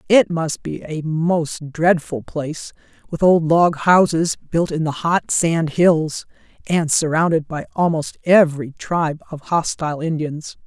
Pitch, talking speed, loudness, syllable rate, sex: 160 Hz, 140 wpm, -18 LUFS, 4.1 syllables/s, female